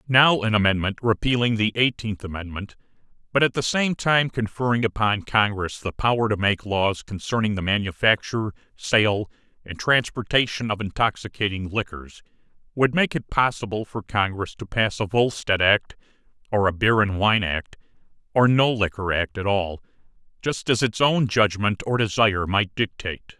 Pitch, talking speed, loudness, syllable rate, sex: 110 Hz, 155 wpm, -22 LUFS, 4.9 syllables/s, male